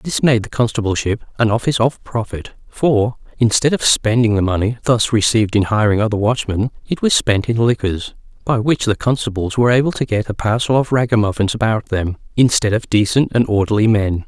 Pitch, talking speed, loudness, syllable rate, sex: 110 Hz, 190 wpm, -16 LUFS, 5.6 syllables/s, male